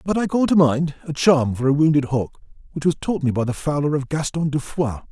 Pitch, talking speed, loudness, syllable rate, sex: 150 Hz, 260 wpm, -20 LUFS, 5.6 syllables/s, male